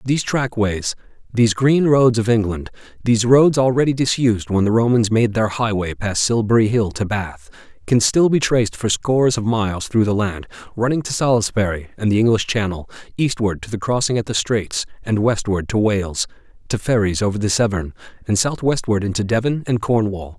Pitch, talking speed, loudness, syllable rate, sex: 110 Hz, 185 wpm, -18 LUFS, 5.4 syllables/s, male